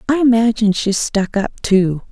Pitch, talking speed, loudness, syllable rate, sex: 215 Hz, 170 wpm, -16 LUFS, 5.0 syllables/s, female